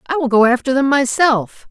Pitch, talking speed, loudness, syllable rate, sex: 260 Hz, 210 wpm, -15 LUFS, 5.0 syllables/s, female